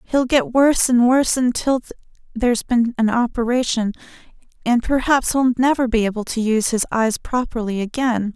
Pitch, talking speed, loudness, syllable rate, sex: 235 Hz, 165 wpm, -18 LUFS, 5.4 syllables/s, female